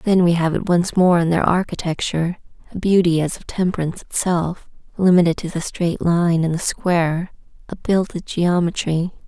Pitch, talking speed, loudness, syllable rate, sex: 175 Hz, 160 wpm, -19 LUFS, 5.1 syllables/s, female